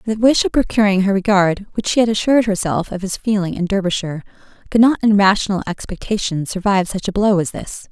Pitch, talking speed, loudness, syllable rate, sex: 200 Hz, 205 wpm, -17 LUFS, 6.2 syllables/s, female